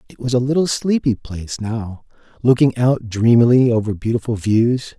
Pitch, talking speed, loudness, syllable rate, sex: 120 Hz, 155 wpm, -17 LUFS, 5.0 syllables/s, male